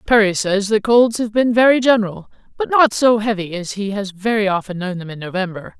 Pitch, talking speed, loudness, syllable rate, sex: 210 Hz, 220 wpm, -17 LUFS, 5.6 syllables/s, female